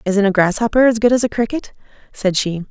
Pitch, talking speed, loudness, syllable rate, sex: 215 Hz, 220 wpm, -16 LUFS, 6.1 syllables/s, female